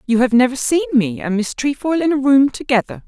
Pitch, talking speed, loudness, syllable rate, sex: 255 Hz, 235 wpm, -16 LUFS, 5.7 syllables/s, female